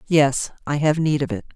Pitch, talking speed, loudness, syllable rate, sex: 145 Hz, 230 wpm, -21 LUFS, 5.1 syllables/s, female